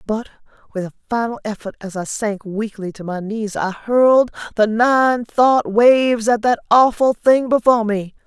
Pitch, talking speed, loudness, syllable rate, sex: 225 Hz, 175 wpm, -17 LUFS, 4.6 syllables/s, female